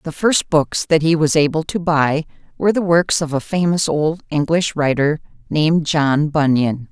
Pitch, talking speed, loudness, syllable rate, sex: 155 Hz, 180 wpm, -17 LUFS, 4.6 syllables/s, female